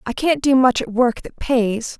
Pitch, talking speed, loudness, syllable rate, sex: 250 Hz, 240 wpm, -18 LUFS, 4.5 syllables/s, female